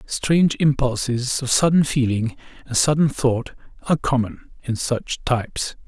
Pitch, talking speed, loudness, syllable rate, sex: 130 Hz, 135 wpm, -21 LUFS, 4.5 syllables/s, male